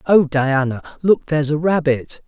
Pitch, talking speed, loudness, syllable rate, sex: 150 Hz, 160 wpm, -18 LUFS, 4.6 syllables/s, male